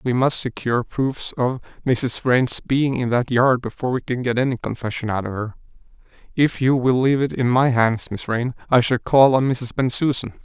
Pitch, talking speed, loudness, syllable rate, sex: 125 Hz, 205 wpm, -20 LUFS, 5.1 syllables/s, male